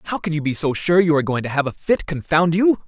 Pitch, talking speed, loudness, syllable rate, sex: 160 Hz, 315 wpm, -19 LUFS, 6.5 syllables/s, male